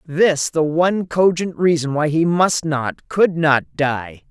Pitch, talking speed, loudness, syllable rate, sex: 165 Hz, 165 wpm, -18 LUFS, 3.7 syllables/s, female